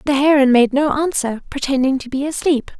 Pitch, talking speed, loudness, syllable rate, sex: 275 Hz, 215 wpm, -17 LUFS, 5.8 syllables/s, female